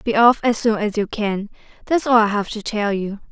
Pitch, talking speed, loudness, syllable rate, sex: 215 Hz, 255 wpm, -19 LUFS, 5.1 syllables/s, female